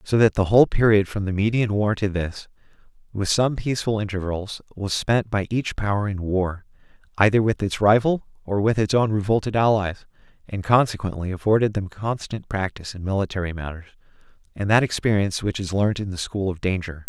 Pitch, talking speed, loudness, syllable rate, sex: 100 Hz, 185 wpm, -22 LUFS, 5.6 syllables/s, male